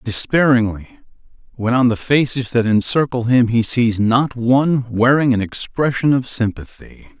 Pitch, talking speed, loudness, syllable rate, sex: 125 Hz, 140 wpm, -16 LUFS, 4.6 syllables/s, male